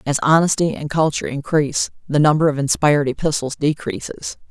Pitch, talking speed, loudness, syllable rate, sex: 150 Hz, 145 wpm, -18 LUFS, 5.9 syllables/s, female